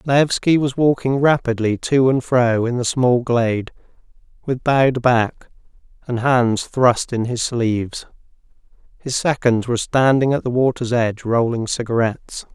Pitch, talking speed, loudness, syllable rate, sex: 125 Hz, 145 wpm, -18 LUFS, 4.5 syllables/s, male